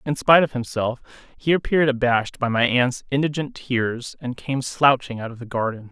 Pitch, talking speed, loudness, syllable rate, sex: 130 Hz, 195 wpm, -21 LUFS, 5.2 syllables/s, male